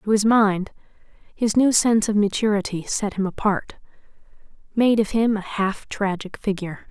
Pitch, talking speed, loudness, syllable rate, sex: 205 Hz, 155 wpm, -21 LUFS, 4.8 syllables/s, female